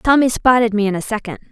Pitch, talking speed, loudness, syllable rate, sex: 225 Hz, 235 wpm, -16 LUFS, 6.5 syllables/s, female